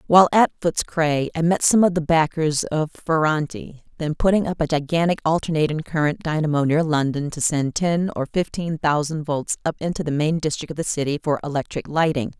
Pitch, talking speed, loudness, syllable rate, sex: 155 Hz, 195 wpm, -21 LUFS, 5.4 syllables/s, female